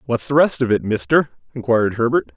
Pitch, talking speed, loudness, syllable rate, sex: 120 Hz, 205 wpm, -18 LUFS, 6.1 syllables/s, male